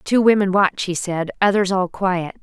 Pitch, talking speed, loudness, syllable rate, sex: 190 Hz, 200 wpm, -18 LUFS, 4.5 syllables/s, female